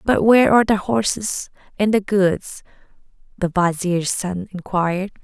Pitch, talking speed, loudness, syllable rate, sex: 195 Hz, 140 wpm, -19 LUFS, 4.5 syllables/s, female